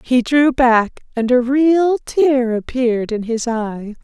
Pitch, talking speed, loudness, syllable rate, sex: 250 Hz, 165 wpm, -16 LUFS, 3.5 syllables/s, female